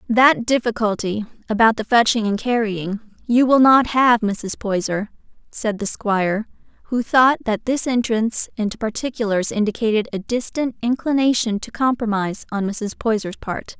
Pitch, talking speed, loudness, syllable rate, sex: 225 Hz, 135 wpm, -19 LUFS, 4.8 syllables/s, female